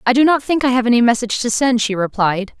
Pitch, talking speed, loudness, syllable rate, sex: 240 Hz, 275 wpm, -16 LUFS, 6.5 syllables/s, female